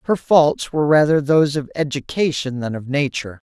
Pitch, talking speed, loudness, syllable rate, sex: 145 Hz, 170 wpm, -18 LUFS, 5.6 syllables/s, male